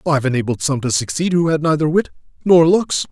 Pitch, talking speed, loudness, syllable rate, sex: 150 Hz, 210 wpm, -16 LUFS, 6.1 syllables/s, male